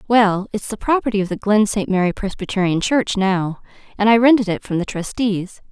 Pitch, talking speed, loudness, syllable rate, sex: 205 Hz, 200 wpm, -18 LUFS, 5.3 syllables/s, female